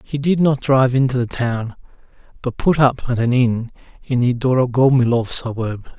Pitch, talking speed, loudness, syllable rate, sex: 125 Hz, 170 wpm, -18 LUFS, 4.9 syllables/s, male